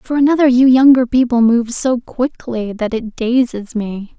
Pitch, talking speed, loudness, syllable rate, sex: 240 Hz, 170 wpm, -14 LUFS, 4.4 syllables/s, female